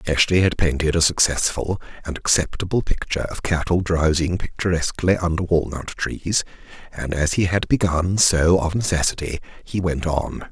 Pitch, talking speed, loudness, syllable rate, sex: 85 Hz, 150 wpm, -21 LUFS, 5.0 syllables/s, male